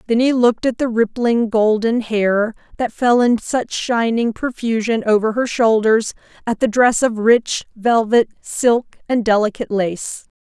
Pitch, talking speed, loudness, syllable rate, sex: 225 Hz, 155 wpm, -17 LUFS, 4.2 syllables/s, female